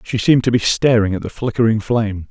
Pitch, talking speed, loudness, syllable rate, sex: 110 Hz, 235 wpm, -16 LUFS, 6.3 syllables/s, male